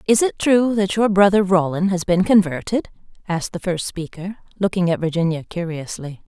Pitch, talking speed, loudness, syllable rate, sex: 185 Hz, 170 wpm, -19 LUFS, 5.2 syllables/s, female